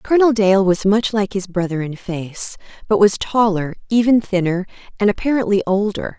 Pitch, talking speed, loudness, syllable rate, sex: 200 Hz, 165 wpm, -18 LUFS, 5.1 syllables/s, female